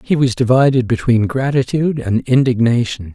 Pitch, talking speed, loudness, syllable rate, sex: 125 Hz, 135 wpm, -15 LUFS, 5.3 syllables/s, male